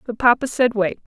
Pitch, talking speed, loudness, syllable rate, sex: 230 Hz, 200 wpm, -19 LUFS, 5.4 syllables/s, female